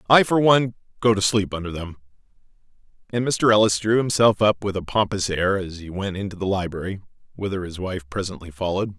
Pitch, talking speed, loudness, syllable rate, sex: 100 Hz, 195 wpm, -22 LUFS, 6.1 syllables/s, male